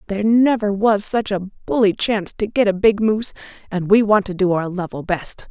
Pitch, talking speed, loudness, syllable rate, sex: 205 Hz, 220 wpm, -18 LUFS, 5.3 syllables/s, female